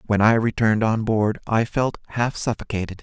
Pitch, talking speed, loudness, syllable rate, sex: 110 Hz, 180 wpm, -21 LUFS, 5.3 syllables/s, male